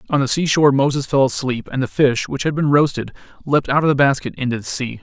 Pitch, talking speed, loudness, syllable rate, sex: 135 Hz, 250 wpm, -18 LUFS, 6.2 syllables/s, male